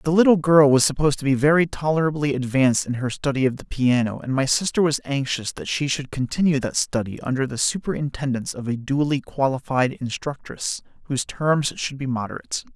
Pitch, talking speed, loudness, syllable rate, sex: 140 Hz, 190 wpm, -22 LUFS, 5.8 syllables/s, male